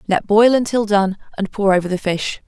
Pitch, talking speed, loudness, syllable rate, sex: 205 Hz, 220 wpm, -17 LUFS, 5.3 syllables/s, female